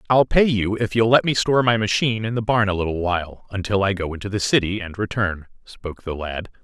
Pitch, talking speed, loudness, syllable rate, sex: 105 Hz, 245 wpm, -21 LUFS, 6.0 syllables/s, male